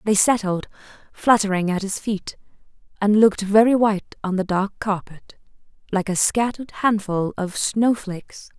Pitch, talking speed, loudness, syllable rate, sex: 205 Hz, 145 wpm, -21 LUFS, 4.8 syllables/s, female